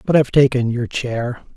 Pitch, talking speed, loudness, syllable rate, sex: 125 Hz, 190 wpm, -18 LUFS, 5.1 syllables/s, male